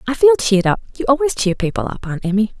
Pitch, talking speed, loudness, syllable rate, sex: 215 Hz, 230 wpm, -17 LUFS, 7.2 syllables/s, female